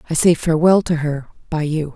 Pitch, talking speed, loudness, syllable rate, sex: 160 Hz, 215 wpm, -17 LUFS, 5.8 syllables/s, female